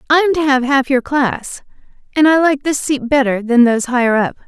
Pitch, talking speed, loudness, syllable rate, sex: 270 Hz, 230 wpm, -14 LUFS, 5.5 syllables/s, female